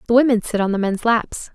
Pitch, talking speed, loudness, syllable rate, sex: 225 Hz, 270 wpm, -18 LUFS, 5.9 syllables/s, female